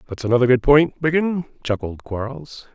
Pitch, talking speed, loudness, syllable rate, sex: 135 Hz, 155 wpm, -19 LUFS, 5.3 syllables/s, male